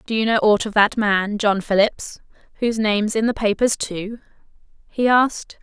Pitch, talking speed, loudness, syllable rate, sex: 215 Hz, 180 wpm, -19 LUFS, 5.0 syllables/s, female